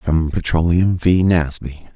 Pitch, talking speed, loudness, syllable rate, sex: 85 Hz, 125 wpm, -17 LUFS, 3.7 syllables/s, male